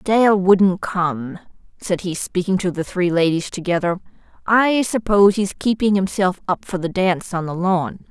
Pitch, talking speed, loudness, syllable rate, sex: 185 Hz, 170 wpm, -19 LUFS, 4.5 syllables/s, female